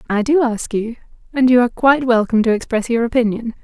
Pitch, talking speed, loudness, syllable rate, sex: 235 Hz, 215 wpm, -16 LUFS, 6.6 syllables/s, female